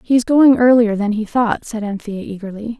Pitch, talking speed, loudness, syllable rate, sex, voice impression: 225 Hz, 195 wpm, -15 LUFS, 4.8 syllables/s, female, feminine, slightly weak, soft, fluent, slightly intellectual, calm, reassuring, elegant, kind, modest